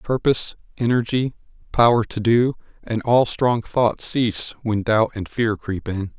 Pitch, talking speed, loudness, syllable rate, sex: 115 Hz, 155 wpm, -21 LUFS, 4.2 syllables/s, male